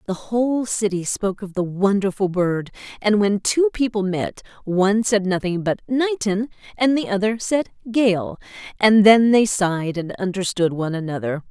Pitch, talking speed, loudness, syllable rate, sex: 200 Hz, 160 wpm, -20 LUFS, 4.8 syllables/s, female